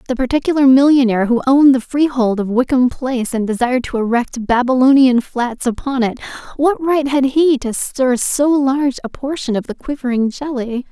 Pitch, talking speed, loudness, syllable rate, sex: 255 Hz, 170 wpm, -15 LUFS, 5.3 syllables/s, female